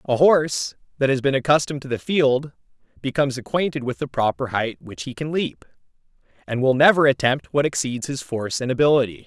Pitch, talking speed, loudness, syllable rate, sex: 130 Hz, 190 wpm, -21 LUFS, 5.9 syllables/s, male